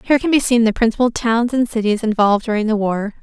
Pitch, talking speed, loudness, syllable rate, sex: 225 Hz, 240 wpm, -16 LUFS, 6.5 syllables/s, female